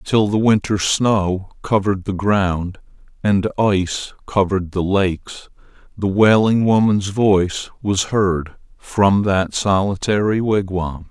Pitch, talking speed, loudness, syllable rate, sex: 100 Hz, 120 wpm, -18 LUFS, 3.8 syllables/s, male